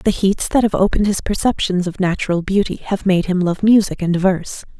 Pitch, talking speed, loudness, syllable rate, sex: 190 Hz, 215 wpm, -17 LUFS, 5.7 syllables/s, female